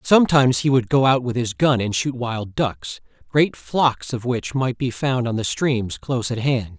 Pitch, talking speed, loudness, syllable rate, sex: 130 Hz, 230 wpm, -20 LUFS, 4.4 syllables/s, male